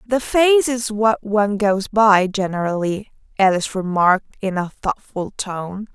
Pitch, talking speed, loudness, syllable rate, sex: 205 Hz, 140 wpm, -19 LUFS, 4.4 syllables/s, female